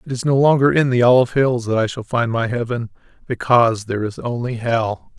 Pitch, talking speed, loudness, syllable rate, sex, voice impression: 120 Hz, 220 wpm, -18 LUFS, 5.8 syllables/s, male, masculine, adult-like, slightly thick, powerful, bright, raspy, cool, friendly, reassuring, wild, lively, slightly strict